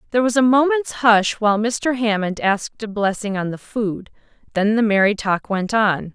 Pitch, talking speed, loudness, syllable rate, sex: 215 Hz, 195 wpm, -19 LUFS, 5.0 syllables/s, female